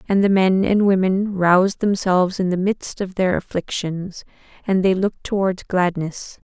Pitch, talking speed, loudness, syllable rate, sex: 190 Hz, 165 wpm, -19 LUFS, 4.6 syllables/s, female